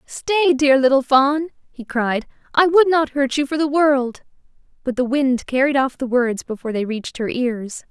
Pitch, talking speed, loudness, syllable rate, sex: 270 Hz, 195 wpm, -18 LUFS, 4.7 syllables/s, female